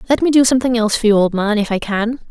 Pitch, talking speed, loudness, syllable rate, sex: 230 Hz, 315 wpm, -15 LUFS, 7.4 syllables/s, female